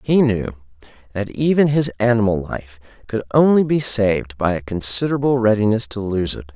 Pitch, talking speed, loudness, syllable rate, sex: 110 Hz, 165 wpm, -18 LUFS, 5.2 syllables/s, male